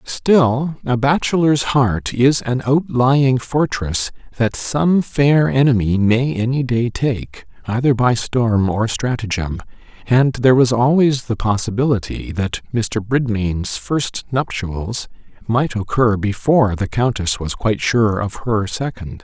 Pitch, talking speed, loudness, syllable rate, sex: 120 Hz, 135 wpm, -17 LUFS, 3.8 syllables/s, male